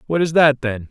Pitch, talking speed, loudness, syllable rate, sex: 140 Hz, 265 wpm, -16 LUFS, 5.3 syllables/s, male